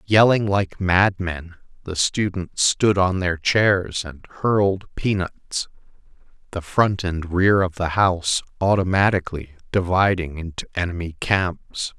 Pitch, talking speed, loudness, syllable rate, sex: 90 Hz, 120 wpm, -21 LUFS, 4.0 syllables/s, male